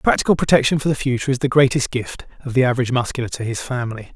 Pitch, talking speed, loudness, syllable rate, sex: 130 Hz, 230 wpm, -19 LUFS, 7.7 syllables/s, male